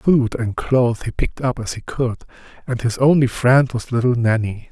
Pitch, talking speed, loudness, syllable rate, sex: 125 Hz, 205 wpm, -19 LUFS, 5.1 syllables/s, male